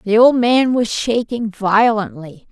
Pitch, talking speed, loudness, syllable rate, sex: 220 Hz, 145 wpm, -15 LUFS, 3.7 syllables/s, female